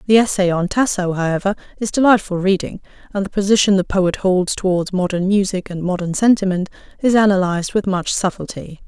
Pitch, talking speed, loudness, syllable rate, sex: 190 Hz, 170 wpm, -17 LUFS, 5.7 syllables/s, female